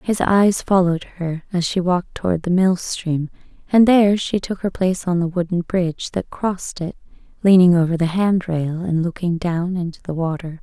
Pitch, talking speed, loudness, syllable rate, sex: 180 Hz, 190 wpm, -19 LUFS, 5.1 syllables/s, female